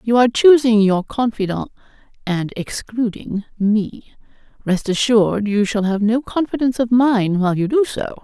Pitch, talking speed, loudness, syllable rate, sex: 225 Hz, 155 wpm, -17 LUFS, 4.9 syllables/s, female